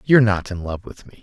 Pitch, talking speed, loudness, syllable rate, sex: 105 Hz, 295 wpm, -20 LUFS, 6.2 syllables/s, male